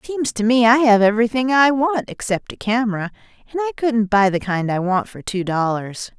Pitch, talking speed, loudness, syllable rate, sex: 225 Hz, 215 wpm, -18 LUFS, 5.3 syllables/s, female